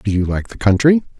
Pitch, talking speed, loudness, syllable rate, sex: 115 Hz, 250 wpm, -16 LUFS, 5.9 syllables/s, male